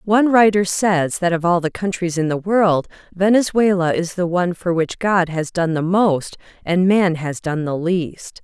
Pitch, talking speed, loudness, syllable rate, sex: 180 Hz, 200 wpm, -18 LUFS, 4.5 syllables/s, female